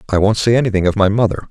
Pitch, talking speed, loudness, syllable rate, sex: 105 Hz, 280 wpm, -15 LUFS, 7.4 syllables/s, male